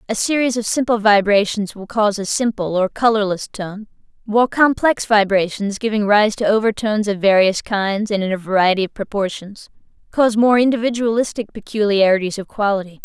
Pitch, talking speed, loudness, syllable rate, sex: 210 Hz, 155 wpm, -17 LUFS, 3.9 syllables/s, female